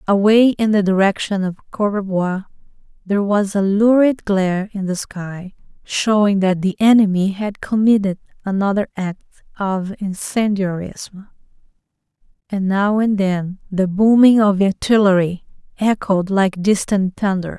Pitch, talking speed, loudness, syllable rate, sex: 200 Hz, 125 wpm, -17 LUFS, 4.3 syllables/s, female